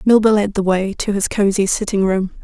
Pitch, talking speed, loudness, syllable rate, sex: 200 Hz, 220 wpm, -17 LUFS, 5.3 syllables/s, female